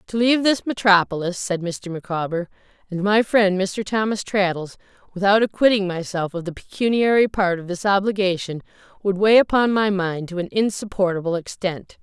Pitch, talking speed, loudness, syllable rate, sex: 195 Hz, 160 wpm, -20 LUFS, 5.2 syllables/s, female